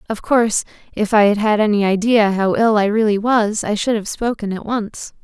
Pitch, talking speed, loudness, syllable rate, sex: 215 Hz, 220 wpm, -17 LUFS, 5.1 syllables/s, female